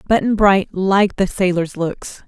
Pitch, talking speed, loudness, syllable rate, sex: 190 Hz, 160 wpm, -17 LUFS, 4.4 syllables/s, female